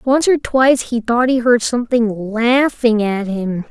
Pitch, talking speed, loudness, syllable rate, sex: 235 Hz, 180 wpm, -15 LUFS, 4.2 syllables/s, female